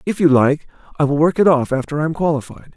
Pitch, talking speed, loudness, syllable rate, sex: 155 Hz, 285 wpm, -17 LUFS, 6.8 syllables/s, male